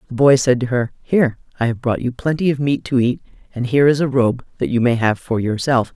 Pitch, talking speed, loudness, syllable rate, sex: 125 Hz, 260 wpm, -18 LUFS, 6.0 syllables/s, female